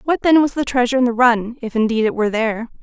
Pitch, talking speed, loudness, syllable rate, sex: 240 Hz, 275 wpm, -17 LUFS, 7.1 syllables/s, female